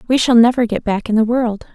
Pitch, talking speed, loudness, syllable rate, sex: 230 Hz, 275 wpm, -15 LUFS, 6.0 syllables/s, female